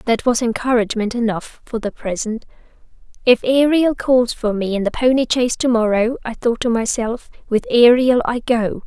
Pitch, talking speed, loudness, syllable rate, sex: 235 Hz, 170 wpm, -17 LUFS, 5.1 syllables/s, female